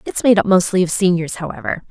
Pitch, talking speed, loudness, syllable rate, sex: 180 Hz, 220 wpm, -16 LUFS, 6.3 syllables/s, female